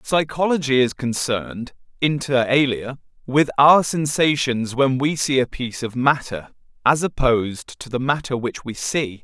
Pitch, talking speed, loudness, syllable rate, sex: 130 Hz, 150 wpm, -20 LUFS, 4.5 syllables/s, male